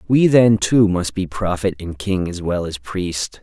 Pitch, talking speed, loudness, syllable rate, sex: 95 Hz, 210 wpm, -18 LUFS, 4.0 syllables/s, male